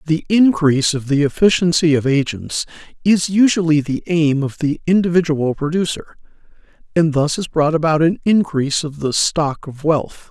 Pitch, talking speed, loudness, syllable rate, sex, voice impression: 155 Hz, 155 wpm, -17 LUFS, 4.9 syllables/s, male, masculine, middle-aged, powerful, slightly hard, fluent, slightly intellectual, slightly mature, wild, lively, slightly strict